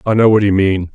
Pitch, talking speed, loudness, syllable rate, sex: 100 Hz, 320 wpm, -13 LUFS, 6.0 syllables/s, male